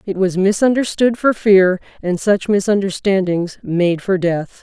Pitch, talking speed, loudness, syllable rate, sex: 195 Hz, 145 wpm, -16 LUFS, 4.2 syllables/s, female